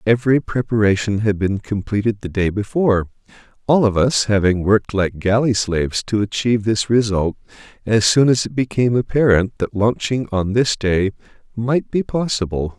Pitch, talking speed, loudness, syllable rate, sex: 110 Hz, 160 wpm, -18 LUFS, 5.1 syllables/s, male